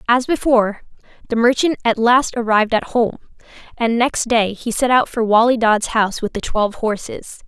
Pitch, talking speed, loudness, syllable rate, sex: 230 Hz, 185 wpm, -17 LUFS, 5.2 syllables/s, female